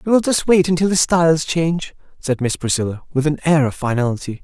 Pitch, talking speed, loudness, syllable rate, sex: 155 Hz, 215 wpm, -17 LUFS, 6.2 syllables/s, male